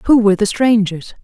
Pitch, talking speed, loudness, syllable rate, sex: 210 Hz, 195 wpm, -14 LUFS, 5.9 syllables/s, female